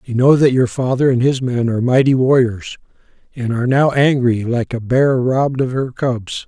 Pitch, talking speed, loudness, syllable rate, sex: 125 Hz, 205 wpm, -15 LUFS, 5.0 syllables/s, male